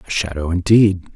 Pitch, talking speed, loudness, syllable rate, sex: 95 Hz, 155 wpm, -16 LUFS, 5.1 syllables/s, male